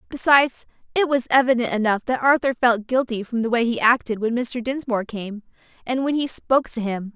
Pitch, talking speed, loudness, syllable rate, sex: 240 Hz, 200 wpm, -21 LUFS, 5.6 syllables/s, female